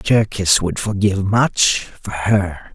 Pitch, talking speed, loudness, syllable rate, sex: 100 Hz, 130 wpm, -17 LUFS, 3.4 syllables/s, male